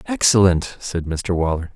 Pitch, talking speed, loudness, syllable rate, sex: 95 Hz, 135 wpm, -19 LUFS, 4.4 syllables/s, male